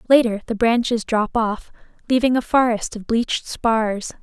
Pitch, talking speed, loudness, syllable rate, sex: 230 Hz, 155 wpm, -20 LUFS, 4.6 syllables/s, female